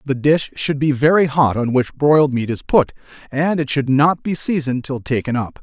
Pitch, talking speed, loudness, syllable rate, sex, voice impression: 140 Hz, 225 wpm, -17 LUFS, 5.1 syllables/s, male, masculine, adult-like, slightly cool, slightly refreshing, sincere